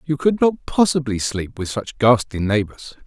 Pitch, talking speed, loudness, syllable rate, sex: 125 Hz, 175 wpm, -19 LUFS, 4.7 syllables/s, male